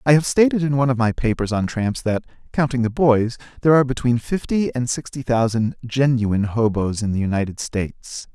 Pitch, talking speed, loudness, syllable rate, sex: 125 Hz, 195 wpm, -20 LUFS, 5.7 syllables/s, male